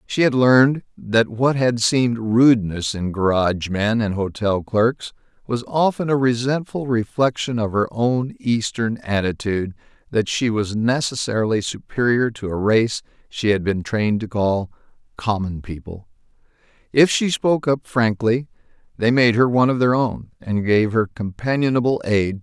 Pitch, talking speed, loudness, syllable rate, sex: 115 Hz, 155 wpm, -20 LUFS, 4.7 syllables/s, male